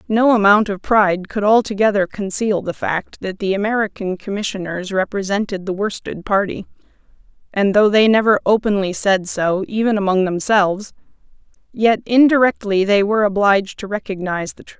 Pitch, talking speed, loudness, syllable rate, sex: 200 Hz, 145 wpm, -17 LUFS, 5.4 syllables/s, female